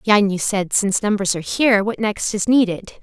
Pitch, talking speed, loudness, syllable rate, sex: 205 Hz, 220 wpm, -18 LUFS, 5.8 syllables/s, female